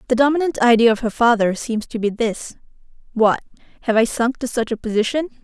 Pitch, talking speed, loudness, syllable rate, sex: 235 Hz, 200 wpm, -18 LUFS, 5.9 syllables/s, female